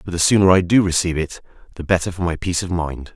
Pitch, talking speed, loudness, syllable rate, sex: 90 Hz, 265 wpm, -18 LUFS, 7.1 syllables/s, male